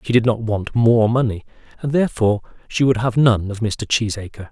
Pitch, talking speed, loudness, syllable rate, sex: 115 Hz, 200 wpm, -19 LUFS, 5.5 syllables/s, male